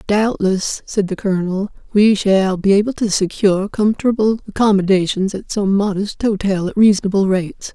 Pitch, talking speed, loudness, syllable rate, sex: 200 Hz, 145 wpm, -16 LUFS, 5.2 syllables/s, female